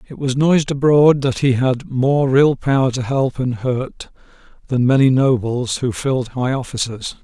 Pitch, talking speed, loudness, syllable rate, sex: 130 Hz, 175 wpm, -17 LUFS, 4.5 syllables/s, male